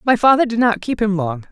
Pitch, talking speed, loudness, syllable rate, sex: 245 Hz, 280 wpm, -16 LUFS, 5.8 syllables/s, female